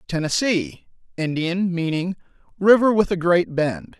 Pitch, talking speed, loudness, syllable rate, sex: 180 Hz, 105 wpm, -20 LUFS, 4.2 syllables/s, male